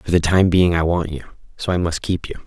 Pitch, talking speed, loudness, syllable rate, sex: 85 Hz, 290 wpm, -19 LUFS, 5.5 syllables/s, male